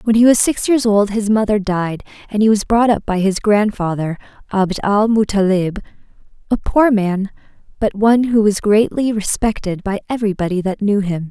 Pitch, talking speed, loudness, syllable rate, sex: 210 Hz, 180 wpm, -16 LUFS, 5.0 syllables/s, female